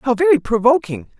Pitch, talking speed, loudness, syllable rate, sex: 270 Hz, 150 wpm, -15 LUFS, 5.6 syllables/s, female